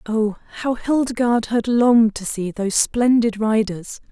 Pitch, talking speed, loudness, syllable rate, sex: 225 Hz, 145 wpm, -19 LUFS, 4.7 syllables/s, female